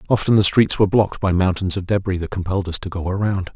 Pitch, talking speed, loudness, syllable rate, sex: 95 Hz, 255 wpm, -19 LUFS, 6.9 syllables/s, male